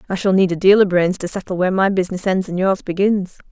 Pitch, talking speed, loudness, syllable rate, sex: 190 Hz, 275 wpm, -17 LUFS, 6.6 syllables/s, female